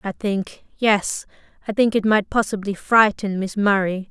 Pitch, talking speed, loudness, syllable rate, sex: 205 Hz, 145 wpm, -20 LUFS, 4.3 syllables/s, female